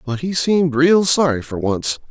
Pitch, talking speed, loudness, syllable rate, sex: 150 Hz, 200 wpm, -17 LUFS, 4.8 syllables/s, male